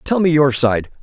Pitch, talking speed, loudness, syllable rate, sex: 145 Hz, 235 wpm, -15 LUFS, 4.8 syllables/s, male